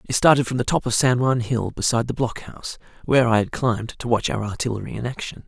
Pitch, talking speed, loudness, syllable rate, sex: 120 Hz, 250 wpm, -21 LUFS, 6.7 syllables/s, male